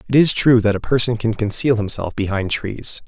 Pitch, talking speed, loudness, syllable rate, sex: 110 Hz, 215 wpm, -18 LUFS, 5.1 syllables/s, male